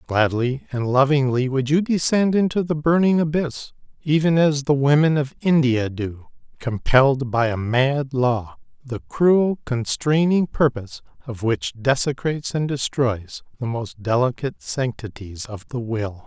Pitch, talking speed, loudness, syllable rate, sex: 135 Hz, 140 wpm, -21 LUFS, 4.3 syllables/s, male